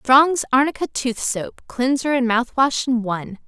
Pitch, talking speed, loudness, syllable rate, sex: 255 Hz, 175 wpm, -20 LUFS, 4.3 syllables/s, female